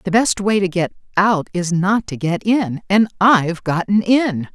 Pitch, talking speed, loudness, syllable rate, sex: 190 Hz, 185 wpm, -17 LUFS, 4.3 syllables/s, female